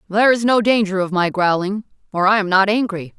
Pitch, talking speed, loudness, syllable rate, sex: 200 Hz, 225 wpm, -17 LUFS, 5.9 syllables/s, female